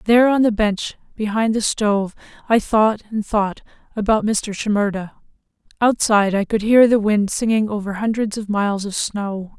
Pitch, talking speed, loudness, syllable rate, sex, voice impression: 210 Hz, 170 wpm, -19 LUFS, 5.0 syllables/s, female, feminine, adult-like, slightly relaxed, slightly bright, soft, slightly muffled, intellectual, friendly, reassuring, slightly unique, kind